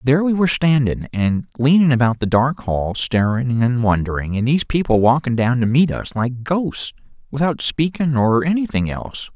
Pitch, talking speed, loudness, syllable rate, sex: 130 Hz, 180 wpm, -18 LUFS, 5.1 syllables/s, male